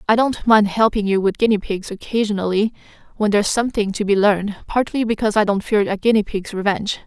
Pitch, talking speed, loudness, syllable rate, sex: 210 Hz, 205 wpm, -18 LUFS, 6.3 syllables/s, female